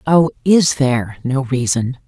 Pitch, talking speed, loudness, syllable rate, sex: 135 Hz, 145 wpm, -16 LUFS, 4.1 syllables/s, female